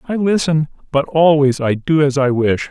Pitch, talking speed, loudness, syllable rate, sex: 145 Hz, 200 wpm, -15 LUFS, 4.7 syllables/s, male